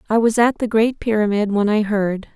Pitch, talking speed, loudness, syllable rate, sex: 215 Hz, 230 wpm, -18 LUFS, 5.2 syllables/s, female